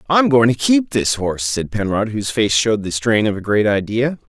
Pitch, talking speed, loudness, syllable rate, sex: 115 Hz, 235 wpm, -17 LUFS, 5.5 syllables/s, male